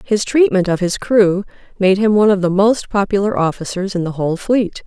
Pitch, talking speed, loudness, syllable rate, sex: 200 Hz, 210 wpm, -16 LUFS, 5.4 syllables/s, female